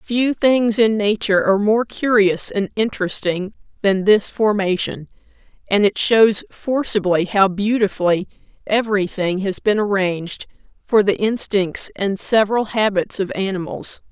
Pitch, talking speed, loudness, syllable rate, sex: 205 Hz, 125 wpm, -18 LUFS, 4.5 syllables/s, female